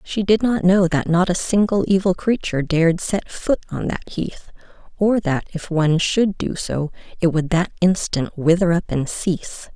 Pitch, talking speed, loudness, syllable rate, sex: 180 Hz, 190 wpm, -20 LUFS, 4.7 syllables/s, female